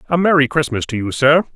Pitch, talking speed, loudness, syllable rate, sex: 140 Hz, 230 wpm, -16 LUFS, 6.1 syllables/s, male